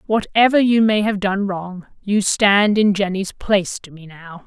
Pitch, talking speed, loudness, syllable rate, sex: 200 Hz, 190 wpm, -17 LUFS, 4.3 syllables/s, female